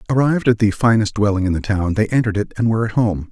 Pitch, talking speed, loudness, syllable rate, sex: 110 Hz, 270 wpm, -17 LUFS, 7.1 syllables/s, male